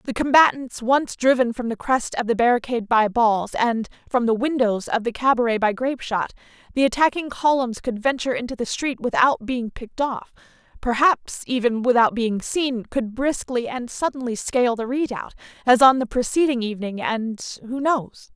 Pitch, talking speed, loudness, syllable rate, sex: 245 Hz, 175 wpm, -21 LUFS, 5.1 syllables/s, female